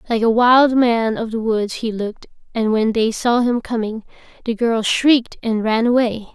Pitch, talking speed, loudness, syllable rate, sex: 230 Hz, 200 wpm, -17 LUFS, 4.7 syllables/s, female